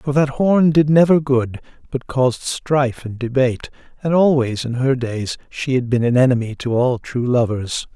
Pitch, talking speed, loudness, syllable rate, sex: 130 Hz, 190 wpm, -18 LUFS, 4.8 syllables/s, male